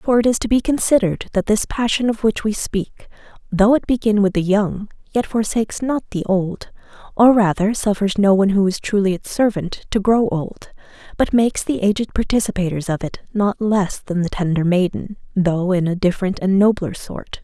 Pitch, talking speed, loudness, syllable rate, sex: 205 Hz, 195 wpm, -18 LUFS, 5.2 syllables/s, female